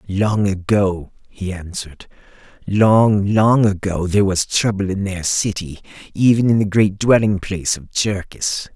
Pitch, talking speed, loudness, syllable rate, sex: 100 Hz, 145 wpm, -17 LUFS, 4.3 syllables/s, male